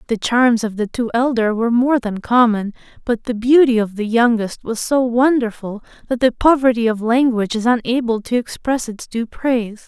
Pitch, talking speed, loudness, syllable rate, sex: 235 Hz, 190 wpm, -17 LUFS, 5.1 syllables/s, female